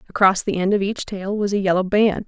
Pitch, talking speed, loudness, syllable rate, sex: 195 Hz, 265 wpm, -20 LUFS, 5.7 syllables/s, female